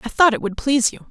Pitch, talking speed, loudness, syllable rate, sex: 250 Hz, 325 wpm, -18 LUFS, 7.1 syllables/s, female